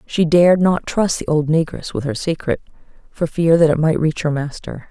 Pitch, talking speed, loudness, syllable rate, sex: 160 Hz, 220 wpm, -17 LUFS, 5.1 syllables/s, female